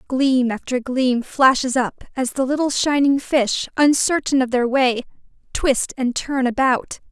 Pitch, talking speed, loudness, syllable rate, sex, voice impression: 260 Hz, 150 wpm, -19 LUFS, 4.0 syllables/s, female, feminine, adult-like, bright, soft, muffled, raspy, friendly, slightly reassuring, elegant, intense, sharp